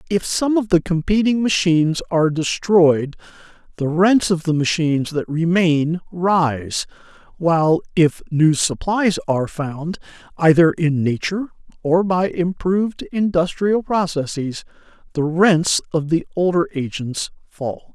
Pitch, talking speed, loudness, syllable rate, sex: 170 Hz, 125 wpm, -18 LUFS, 4.2 syllables/s, male